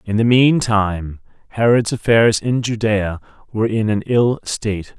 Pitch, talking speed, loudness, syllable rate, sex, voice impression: 110 Hz, 155 wpm, -17 LUFS, 4.4 syllables/s, male, masculine, adult-like, tensed, hard, clear, cool, intellectual, sincere, calm, wild, slightly lively, slightly strict, modest